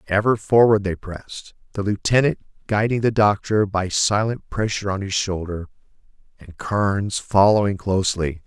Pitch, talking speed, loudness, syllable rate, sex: 100 Hz, 135 wpm, -20 LUFS, 5.0 syllables/s, male